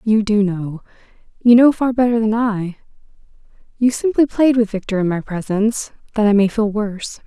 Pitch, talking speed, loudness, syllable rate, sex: 215 Hz, 175 wpm, -17 LUFS, 5.4 syllables/s, female